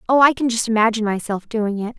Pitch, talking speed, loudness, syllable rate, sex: 225 Hz, 240 wpm, -19 LUFS, 6.7 syllables/s, female